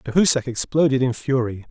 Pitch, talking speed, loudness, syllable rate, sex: 130 Hz, 140 wpm, -20 LUFS, 5.5 syllables/s, male